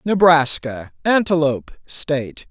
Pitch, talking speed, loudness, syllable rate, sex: 155 Hz, 70 wpm, -18 LUFS, 4.0 syllables/s, male